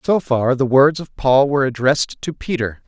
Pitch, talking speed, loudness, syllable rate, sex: 135 Hz, 210 wpm, -17 LUFS, 5.1 syllables/s, male